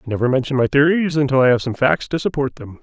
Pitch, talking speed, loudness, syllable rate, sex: 135 Hz, 275 wpm, -17 LUFS, 6.5 syllables/s, male